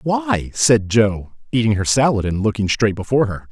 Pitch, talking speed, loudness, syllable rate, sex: 115 Hz, 190 wpm, -18 LUFS, 5.0 syllables/s, male